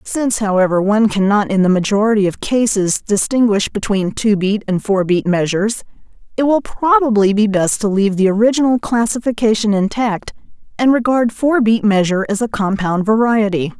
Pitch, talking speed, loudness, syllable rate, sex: 215 Hz, 160 wpm, -15 LUFS, 5.4 syllables/s, female